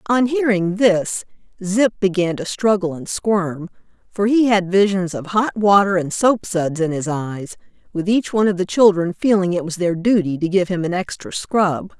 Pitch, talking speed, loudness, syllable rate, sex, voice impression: 190 Hz, 190 wpm, -18 LUFS, 4.6 syllables/s, female, very feminine, very middle-aged, thin, very tensed, powerful, bright, hard, very clear, fluent, cool, intellectual, very refreshing, sincere, very calm, friendly, reassuring, very unique, elegant, very wild, lively, strict, slightly intense, sharp